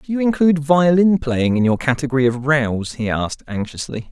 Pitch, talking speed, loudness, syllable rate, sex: 140 Hz, 190 wpm, -18 LUFS, 5.5 syllables/s, male